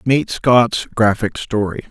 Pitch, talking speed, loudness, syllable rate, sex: 115 Hz, 125 wpm, -16 LUFS, 3.5 syllables/s, male